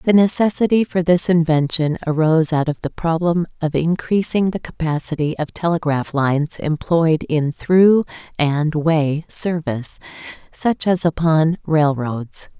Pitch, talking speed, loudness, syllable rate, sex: 160 Hz, 130 wpm, -18 LUFS, 4.3 syllables/s, female